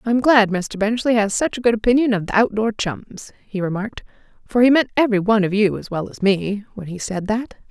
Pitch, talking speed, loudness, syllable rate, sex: 215 Hz, 235 wpm, -19 LUFS, 5.7 syllables/s, female